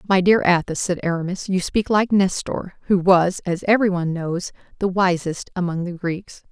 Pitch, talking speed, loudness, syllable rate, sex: 180 Hz, 175 wpm, -20 LUFS, 4.9 syllables/s, female